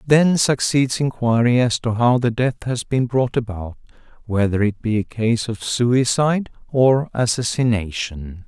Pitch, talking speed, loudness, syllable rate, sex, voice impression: 120 Hz, 150 wpm, -19 LUFS, 4.3 syllables/s, male, masculine, slightly young, adult-like, slightly thick, slightly tensed, slightly weak, bright, soft, clear, fluent, cool, slightly intellectual, refreshing, sincere, very calm, very reassuring, elegant, slightly sweet, kind